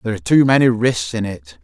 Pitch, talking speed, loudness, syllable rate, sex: 105 Hz, 255 wpm, -16 LUFS, 6.6 syllables/s, male